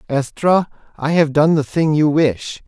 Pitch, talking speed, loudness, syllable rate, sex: 150 Hz, 180 wpm, -16 LUFS, 4.1 syllables/s, male